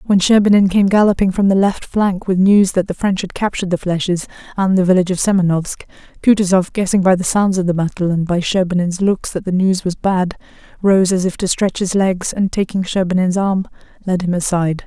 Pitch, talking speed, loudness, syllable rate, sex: 185 Hz, 215 wpm, -16 LUFS, 5.7 syllables/s, female